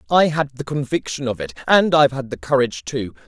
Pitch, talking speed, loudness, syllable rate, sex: 135 Hz, 220 wpm, -19 LUFS, 6.1 syllables/s, male